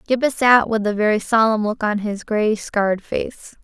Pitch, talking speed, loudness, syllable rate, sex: 215 Hz, 200 wpm, -19 LUFS, 4.7 syllables/s, female